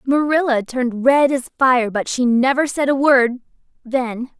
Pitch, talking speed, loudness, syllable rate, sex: 255 Hz, 150 wpm, -17 LUFS, 4.4 syllables/s, female